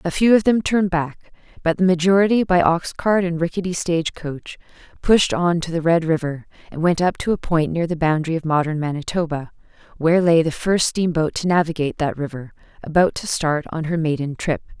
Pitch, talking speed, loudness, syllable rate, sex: 170 Hz, 200 wpm, -20 LUFS, 5.6 syllables/s, female